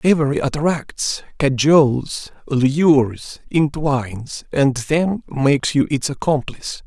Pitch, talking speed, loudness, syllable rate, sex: 140 Hz, 95 wpm, -18 LUFS, 3.7 syllables/s, male